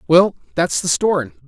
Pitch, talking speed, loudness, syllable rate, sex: 175 Hz, 205 wpm, -18 LUFS, 5.8 syllables/s, male